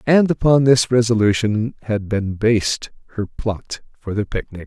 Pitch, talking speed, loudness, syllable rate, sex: 110 Hz, 155 wpm, -19 LUFS, 4.4 syllables/s, male